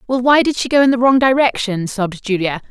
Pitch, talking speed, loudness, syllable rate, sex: 235 Hz, 245 wpm, -15 LUFS, 6.1 syllables/s, female